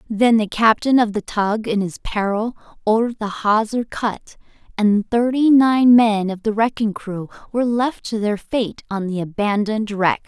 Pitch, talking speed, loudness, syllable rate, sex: 220 Hz, 175 wpm, -19 LUFS, 4.6 syllables/s, female